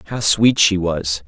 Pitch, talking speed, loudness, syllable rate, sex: 95 Hz, 190 wpm, -16 LUFS, 3.8 syllables/s, male